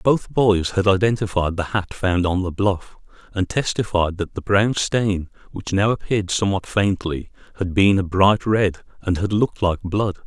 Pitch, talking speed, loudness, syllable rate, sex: 95 Hz, 180 wpm, -20 LUFS, 4.6 syllables/s, male